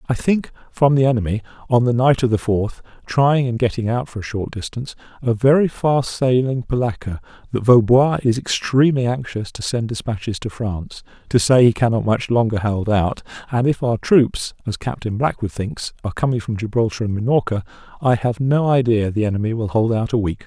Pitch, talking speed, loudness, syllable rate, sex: 120 Hz, 195 wpm, -19 LUFS, 5.4 syllables/s, male